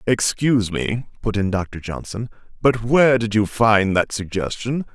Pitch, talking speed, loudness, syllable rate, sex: 110 Hz, 160 wpm, -20 LUFS, 4.6 syllables/s, male